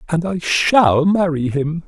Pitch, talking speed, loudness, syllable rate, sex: 165 Hz, 160 wpm, -16 LUFS, 3.6 syllables/s, male